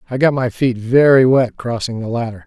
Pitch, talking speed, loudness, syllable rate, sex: 120 Hz, 220 wpm, -15 LUFS, 5.3 syllables/s, male